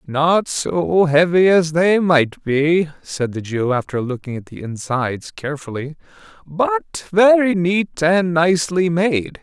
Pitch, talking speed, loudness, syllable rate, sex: 160 Hz, 140 wpm, -17 LUFS, 3.8 syllables/s, male